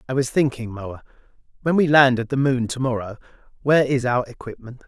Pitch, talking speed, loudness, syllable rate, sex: 130 Hz, 160 wpm, -20 LUFS, 5.8 syllables/s, male